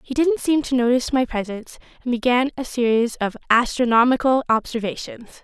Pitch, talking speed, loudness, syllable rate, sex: 245 Hz, 155 wpm, -20 LUFS, 5.6 syllables/s, female